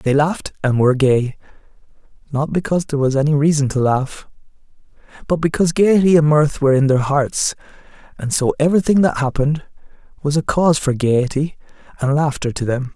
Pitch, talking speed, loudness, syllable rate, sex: 145 Hz, 165 wpm, -17 LUFS, 5.9 syllables/s, male